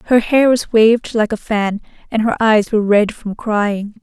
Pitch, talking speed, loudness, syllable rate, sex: 220 Hz, 210 wpm, -15 LUFS, 4.6 syllables/s, female